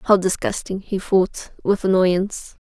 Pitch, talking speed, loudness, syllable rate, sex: 190 Hz, 135 wpm, -20 LUFS, 4.1 syllables/s, female